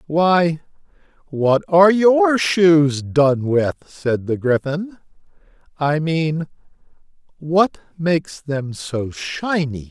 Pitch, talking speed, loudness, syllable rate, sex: 160 Hz, 105 wpm, -18 LUFS, 3.0 syllables/s, male